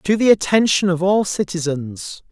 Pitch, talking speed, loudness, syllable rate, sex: 180 Hz, 155 wpm, -17 LUFS, 4.5 syllables/s, male